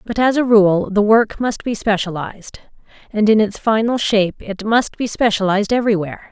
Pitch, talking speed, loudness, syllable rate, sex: 210 Hz, 180 wpm, -16 LUFS, 5.6 syllables/s, female